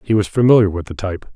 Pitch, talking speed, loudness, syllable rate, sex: 100 Hz, 265 wpm, -16 LUFS, 7.3 syllables/s, male